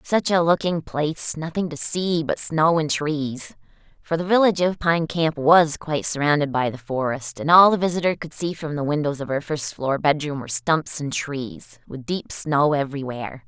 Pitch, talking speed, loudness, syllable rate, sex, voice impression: 150 Hz, 200 wpm, -22 LUFS, 4.9 syllables/s, female, feminine, adult-like, tensed, powerful, clear, nasal, intellectual, calm, lively, sharp